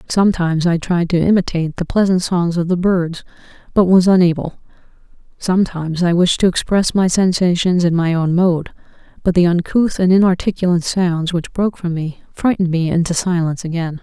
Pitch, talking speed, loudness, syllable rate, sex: 175 Hz, 170 wpm, -16 LUFS, 5.7 syllables/s, female